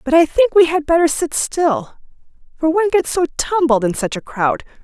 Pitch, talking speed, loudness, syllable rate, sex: 295 Hz, 210 wpm, -16 LUFS, 5.2 syllables/s, female